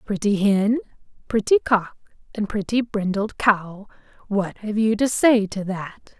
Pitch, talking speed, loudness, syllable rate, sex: 210 Hz, 145 wpm, -21 LUFS, 4.0 syllables/s, female